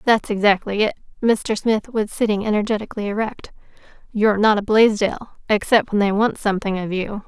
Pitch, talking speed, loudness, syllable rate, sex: 210 Hz, 155 wpm, -19 LUFS, 5.7 syllables/s, female